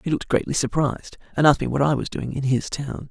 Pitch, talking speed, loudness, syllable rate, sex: 140 Hz, 270 wpm, -22 LUFS, 6.7 syllables/s, male